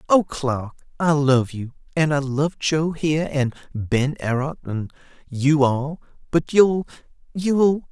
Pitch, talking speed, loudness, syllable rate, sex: 145 Hz, 135 wpm, -21 LUFS, 3.5 syllables/s, male